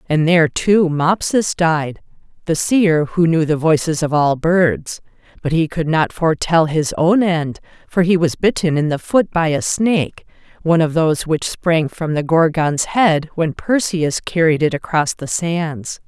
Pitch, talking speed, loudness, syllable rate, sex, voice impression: 165 Hz, 180 wpm, -16 LUFS, 4.3 syllables/s, female, very feminine, middle-aged, slightly thin, tensed, slightly powerful, slightly bright, soft, very clear, fluent, slightly raspy, cool, very intellectual, refreshing, sincere, very calm, friendly, reassuring, very unique, very elegant, slightly wild, sweet, lively, kind, slightly modest